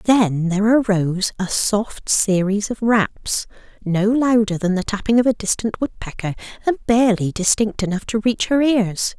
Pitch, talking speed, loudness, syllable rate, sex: 210 Hz, 165 wpm, -19 LUFS, 4.6 syllables/s, female